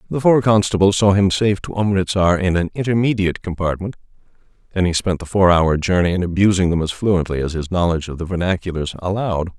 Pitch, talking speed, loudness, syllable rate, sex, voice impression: 90 Hz, 195 wpm, -18 LUFS, 6.3 syllables/s, male, masculine, adult-like, tensed, slightly dark, fluent, intellectual, calm, reassuring, wild, modest